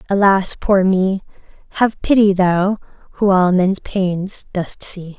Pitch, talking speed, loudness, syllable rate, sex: 190 Hz, 140 wpm, -16 LUFS, 3.6 syllables/s, female